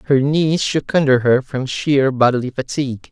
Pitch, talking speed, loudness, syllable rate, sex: 135 Hz, 175 wpm, -17 LUFS, 4.8 syllables/s, male